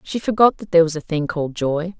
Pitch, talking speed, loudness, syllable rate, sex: 170 Hz, 270 wpm, -19 LUFS, 6.4 syllables/s, female